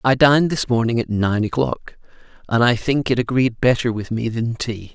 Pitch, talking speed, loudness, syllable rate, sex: 120 Hz, 205 wpm, -19 LUFS, 5.1 syllables/s, male